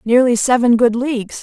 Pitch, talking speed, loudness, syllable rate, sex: 240 Hz, 170 wpm, -14 LUFS, 5.3 syllables/s, female